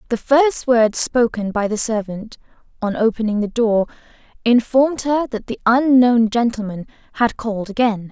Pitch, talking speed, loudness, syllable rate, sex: 230 Hz, 150 wpm, -18 LUFS, 4.8 syllables/s, female